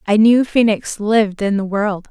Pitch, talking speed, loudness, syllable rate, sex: 210 Hz, 200 wpm, -16 LUFS, 4.7 syllables/s, female